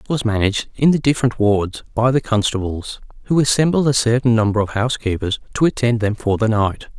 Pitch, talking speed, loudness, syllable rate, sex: 115 Hz, 200 wpm, -18 LUFS, 6.1 syllables/s, male